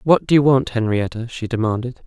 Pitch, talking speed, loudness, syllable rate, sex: 120 Hz, 205 wpm, -18 LUFS, 5.6 syllables/s, male